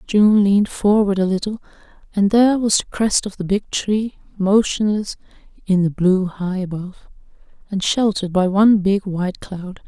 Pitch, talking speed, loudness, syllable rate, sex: 200 Hz, 165 wpm, -18 LUFS, 4.9 syllables/s, female